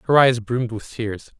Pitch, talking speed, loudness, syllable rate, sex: 115 Hz, 215 wpm, -21 LUFS, 5.0 syllables/s, male